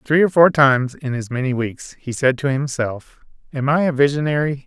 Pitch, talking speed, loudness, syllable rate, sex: 140 Hz, 205 wpm, -18 LUFS, 5.2 syllables/s, male